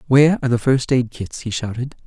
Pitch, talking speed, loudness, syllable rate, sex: 125 Hz, 235 wpm, -19 LUFS, 6.2 syllables/s, female